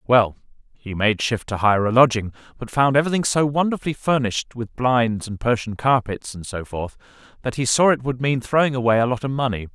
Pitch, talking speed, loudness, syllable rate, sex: 120 Hz, 210 wpm, -20 LUFS, 5.6 syllables/s, male